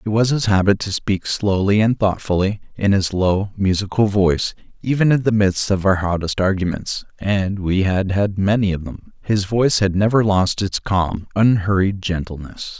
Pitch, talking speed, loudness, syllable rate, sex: 100 Hz, 180 wpm, -18 LUFS, 4.7 syllables/s, male